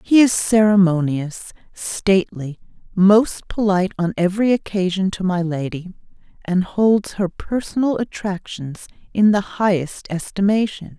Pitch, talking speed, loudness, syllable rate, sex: 190 Hz, 115 wpm, -19 LUFS, 4.4 syllables/s, female